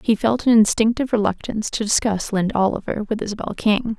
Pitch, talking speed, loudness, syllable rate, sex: 215 Hz, 180 wpm, -20 LUFS, 6.4 syllables/s, female